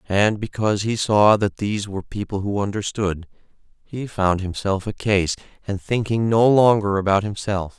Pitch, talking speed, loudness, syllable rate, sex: 105 Hz, 160 wpm, -21 LUFS, 4.9 syllables/s, male